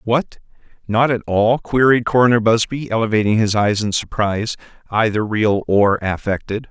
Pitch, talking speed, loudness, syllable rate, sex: 110 Hz, 145 wpm, -17 LUFS, 4.9 syllables/s, male